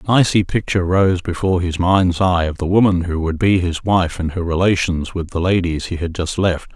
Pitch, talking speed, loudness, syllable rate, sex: 90 Hz, 230 wpm, -17 LUFS, 5.3 syllables/s, male